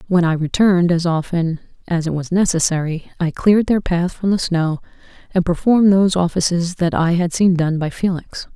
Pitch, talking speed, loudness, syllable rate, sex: 175 Hz, 190 wpm, -17 LUFS, 5.3 syllables/s, female